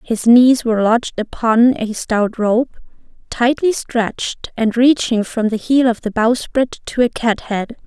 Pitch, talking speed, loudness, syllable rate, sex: 235 Hz, 160 wpm, -16 LUFS, 4.2 syllables/s, female